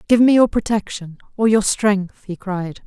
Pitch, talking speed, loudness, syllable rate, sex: 205 Hz, 165 wpm, -17 LUFS, 4.5 syllables/s, female